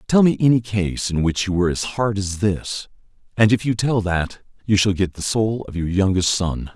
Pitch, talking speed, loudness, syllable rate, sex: 100 Hz, 230 wpm, -20 LUFS, 5.0 syllables/s, male